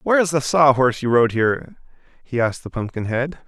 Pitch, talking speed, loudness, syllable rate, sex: 135 Hz, 205 wpm, -19 LUFS, 6.1 syllables/s, male